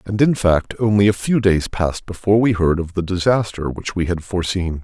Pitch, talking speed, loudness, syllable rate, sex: 95 Hz, 225 wpm, -18 LUFS, 5.5 syllables/s, male